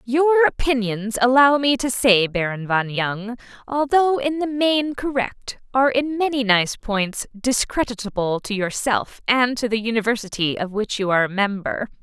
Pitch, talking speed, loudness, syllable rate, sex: 235 Hz, 160 wpm, -20 LUFS, 4.6 syllables/s, female